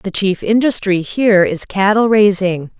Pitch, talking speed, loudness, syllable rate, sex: 200 Hz, 150 wpm, -14 LUFS, 4.4 syllables/s, female